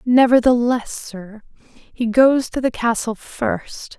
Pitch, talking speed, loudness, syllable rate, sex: 240 Hz, 120 wpm, -18 LUFS, 3.4 syllables/s, female